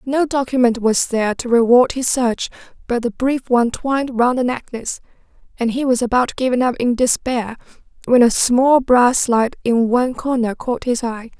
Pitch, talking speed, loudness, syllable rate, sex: 245 Hz, 185 wpm, -17 LUFS, 5.1 syllables/s, female